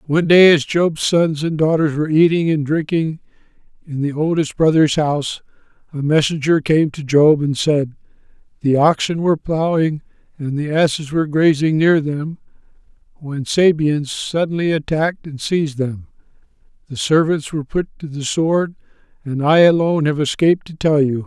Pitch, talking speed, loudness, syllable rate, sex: 155 Hz, 160 wpm, -17 LUFS, 5.0 syllables/s, male